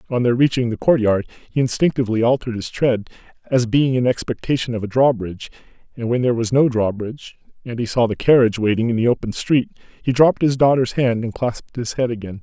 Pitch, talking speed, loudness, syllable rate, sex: 120 Hz, 210 wpm, -19 LUFS, 6.4 syllables/s, male